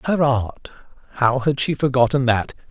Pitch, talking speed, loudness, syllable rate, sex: 130 Hz, 135 wpm, -19 LUFS, 4.7 syllables/s, male